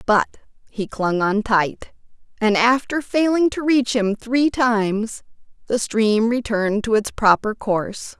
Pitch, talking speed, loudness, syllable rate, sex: 225 Hz, 145 wpm, -19 LUFS, 4.0 syllables/s, female